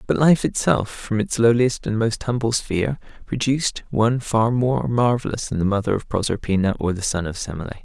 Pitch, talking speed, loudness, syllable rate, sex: 110 Hz, 190 wpm, -21 LUFS, 5.5 syllables/s, male